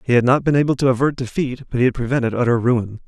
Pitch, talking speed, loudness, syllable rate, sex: 125 Hz, 275 wpm, -18 LUFS, 7.0 syllables/s, male